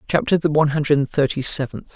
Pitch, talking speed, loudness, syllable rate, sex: 145 Hz, 215 wpm, -18 LUFS, 6.7 syllables/s, male